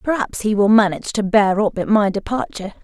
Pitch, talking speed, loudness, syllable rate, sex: 210 Hz, 210 wpm, -17 LUFS, 6.0 syllables/s, female